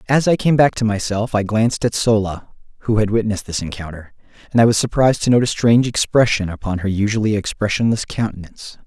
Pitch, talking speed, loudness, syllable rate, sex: 110 Hz, 195 wpm, -17 LUFS, 6.3 syllables/s, male